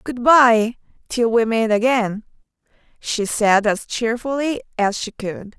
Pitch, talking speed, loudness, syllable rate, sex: 225 Hz, 140 wpm, -18 LUFS, 3.8 syllables/s, female